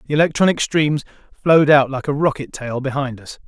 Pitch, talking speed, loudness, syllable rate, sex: 140 Hz, 190 wpm, -18 LUFS, 5.9 syllables/s, male